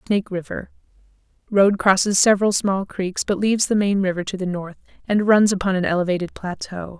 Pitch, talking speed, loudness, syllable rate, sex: 195 Hz, 170 wpm, -20 LUFS, 5.7 syllables/s, female